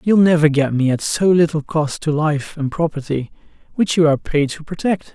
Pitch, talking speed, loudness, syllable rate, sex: 155 Hz, 210 wpm, -18 LUFS, 5.2 syllables/s, male